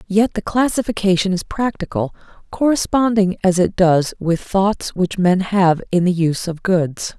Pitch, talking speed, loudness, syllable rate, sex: 190 Hz, 160 wpm, -18 LUFS, 4.4 syllables/s, female